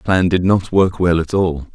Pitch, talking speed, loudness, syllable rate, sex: 90 Hz, 240 wpm, -16 LUFS, 4.2 syllables/s, male